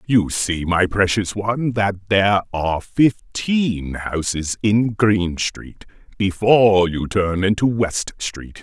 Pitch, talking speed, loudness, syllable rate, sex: 100 Hz, 130 wpm, -19 LUFS, 3.5 syllables/s, male